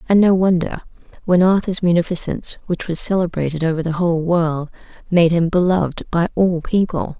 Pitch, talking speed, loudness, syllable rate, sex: 175 Hz, 160 wpm, -18 LUFS, 5.5 syllables/s, female